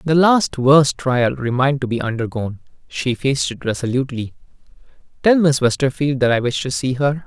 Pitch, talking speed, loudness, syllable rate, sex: 135 Hz, 175 wpm, -18 LUFS, 5.5 syllables/s, male